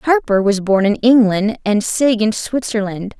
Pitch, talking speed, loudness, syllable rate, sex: 220 Hz, 170 wpm, -15 LUFS, 4.2 syllables/s, female